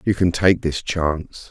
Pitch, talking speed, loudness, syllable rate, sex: 85 Hz, 200 wpm, -20 LUFS, 4.3 syllables/s, male